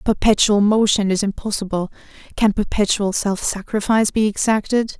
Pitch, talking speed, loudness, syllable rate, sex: 205 Hz, 130 wpm, -18 LUFS, 5.4 syllables/s, female